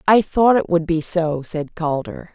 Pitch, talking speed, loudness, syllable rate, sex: 175 Hz, 205 wpm, -19 LUFS, 4.1 syllables/s, female